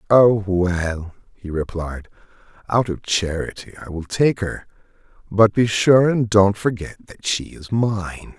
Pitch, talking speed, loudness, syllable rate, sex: 100 Hz, 150 wpm, -20 LUFS, 3.8 syllables/s, male